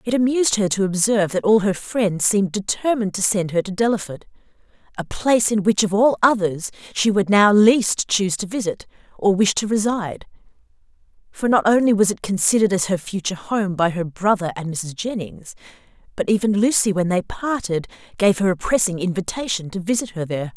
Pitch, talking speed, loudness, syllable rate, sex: 200 Hz, 185 wpm, -19 LUFS, 5.7 syllables/s, female